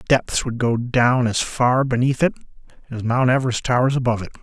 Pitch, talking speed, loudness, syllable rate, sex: 125 Hz, 205 wpm, -19 LUFS, 5.7 syllables/s, male